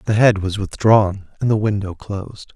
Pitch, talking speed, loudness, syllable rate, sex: 105 Hz, 190 wpm, -18 LUFS, 4.8 syllables/s, male